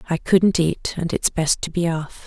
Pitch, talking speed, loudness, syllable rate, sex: 170 Hz, 240 wpm, -20 LUFS, 4.4 syllables/s, female